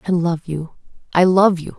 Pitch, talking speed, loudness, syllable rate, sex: 175 Hz, 170 wpm, -17 LUFS, 4.8 syllables/s, female